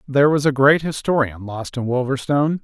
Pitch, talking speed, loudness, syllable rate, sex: 135 Hz, 180 wpm, -19 LUFS, 5.7 syllables/s, male